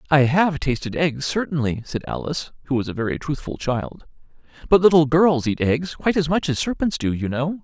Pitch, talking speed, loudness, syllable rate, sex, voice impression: 145 Hz, 205 wpm, -21 LUFS, 5.5 syllables/s, male, masculine, adult-like, slightly thick, cool, intellectual